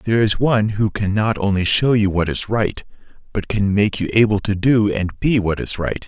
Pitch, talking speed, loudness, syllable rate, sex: 105 Hz, 235 wpm, -18 LUFS, 5.2 syllables/s, male